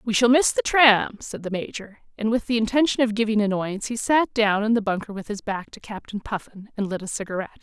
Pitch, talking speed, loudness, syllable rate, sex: 220 Hz, 245 wpm, -22 LUFS, 6.0 syllables/s, female